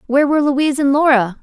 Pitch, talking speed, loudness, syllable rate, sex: 275 Hz, 210 wpm, -14 LUFS, 7.1 syllables/s, female